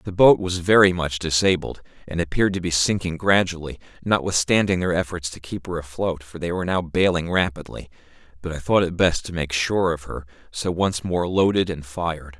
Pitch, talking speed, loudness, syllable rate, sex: 85 Hz, 195 wpm, -21 LUFS, 5.4 syllables/s, male